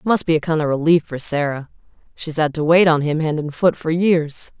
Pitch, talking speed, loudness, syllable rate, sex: 155 Hz, 235 wpm, -18 LUFS, 5.2 syllables/s, female